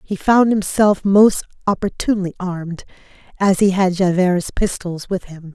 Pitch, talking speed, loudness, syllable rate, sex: 190 Hz, 140 wpm, -17 LUFS, 4.6 syllables/s, female